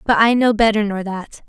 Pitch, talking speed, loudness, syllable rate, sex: 215 Hz, 245 wpm, -16 LUFS, 5.3 syllables/s, female